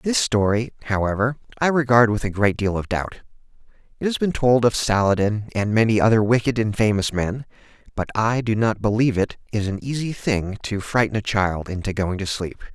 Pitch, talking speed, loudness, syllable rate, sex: 110 Hz, 200 wpm, -21 LUFS, 5.3 syllables/s, male